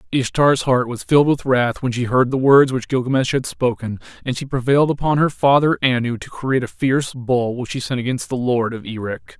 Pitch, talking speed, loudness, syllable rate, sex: 130 Hz, 225 wpm, -18 LUFS, 5.6 syllables/s, male